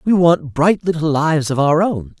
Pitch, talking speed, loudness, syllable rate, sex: 155 Hz, 220 wpm, -16 LUFS, 4.8 syllables/s, male